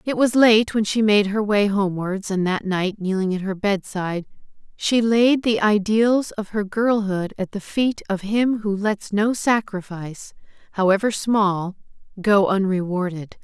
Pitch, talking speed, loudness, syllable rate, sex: 205 Hz, 160 wpm, -20 LUFS, 4.3 syllables/s, female